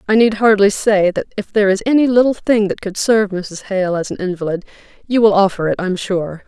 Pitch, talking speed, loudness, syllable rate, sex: 200 Hz, 230 wpm, -16 LUFS, 5.7 syllables/s, female